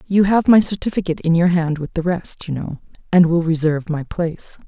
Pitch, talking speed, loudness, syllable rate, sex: 170 Hz, 220 wpm, -18 LUFS, 5.8 syllables/s, female